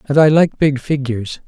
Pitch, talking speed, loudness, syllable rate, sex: 140 Hz, 205 wpm, -15 LUFS, 5.2 syllables/s, male